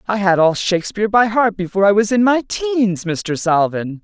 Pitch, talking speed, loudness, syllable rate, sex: 195 Hz, 210 wpm, -16 LUFS, 5.2 syllables/s, female